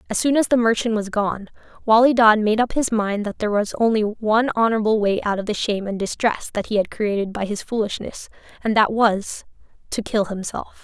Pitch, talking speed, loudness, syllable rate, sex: 215 Hz, 210 wpm, -20 LUFS, 5.7 syllables/s, female